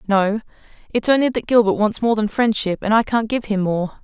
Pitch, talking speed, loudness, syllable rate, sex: 215 Hz, 225 wpm, -19 LUFS, 5.5 syllables/s, female